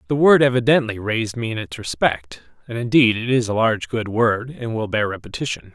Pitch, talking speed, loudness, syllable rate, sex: 115 Hz, 210 wpm, -19 LUFS, 5.6 syllables/s, male